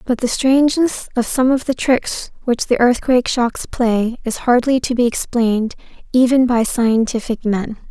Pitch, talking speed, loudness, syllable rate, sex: 245 Hz, 165 wpm, -17 LUFS, 4.6 syllables/s, female